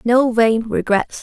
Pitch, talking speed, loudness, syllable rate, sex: 230 Hz, 145 wpm, -16 LUFS, 3.8 syllables/s, female